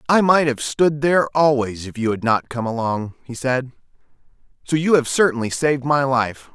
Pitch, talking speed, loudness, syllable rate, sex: 130 Hz, 195 wpm, -19 LUFS, 5.1 syllables/s, male